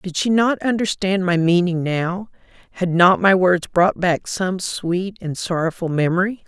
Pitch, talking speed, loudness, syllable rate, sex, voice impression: 180 Hz, 160 wpm, -19 LUFS, 4.2 syllables/s, female, very feminine, middle-aged, thin, tensed, slightly weak, dark, hard, clear, fluent, slightly cool, intellectual, very refreshing, very sincere, slightly calm, slightly friendly, slightly reassuring, very unique, slightly elegant, very wild, sweet, very lively, strict, intense, sharp